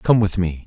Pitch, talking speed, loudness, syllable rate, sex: 100 Hz, 270 wpm, -19 LUFS, 4.8 syllables/s, male